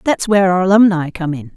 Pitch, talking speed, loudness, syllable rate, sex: 185 Hz, 230 wpm, -14 LUFS, 6.3 syllables/s, female